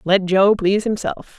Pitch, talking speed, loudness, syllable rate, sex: 195 Hz, 175 wpm, -17 LUFS, 4.8 syllables/s, female